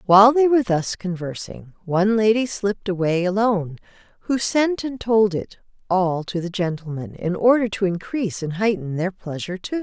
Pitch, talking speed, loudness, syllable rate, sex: 200 Hz, 170 wpm, -21 LUFS, 5.2 syllables/s, female